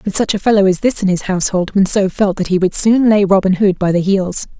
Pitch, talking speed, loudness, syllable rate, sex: 195 Hz, 275 wpm, -14 LUFS, 6.0 syllables/s, female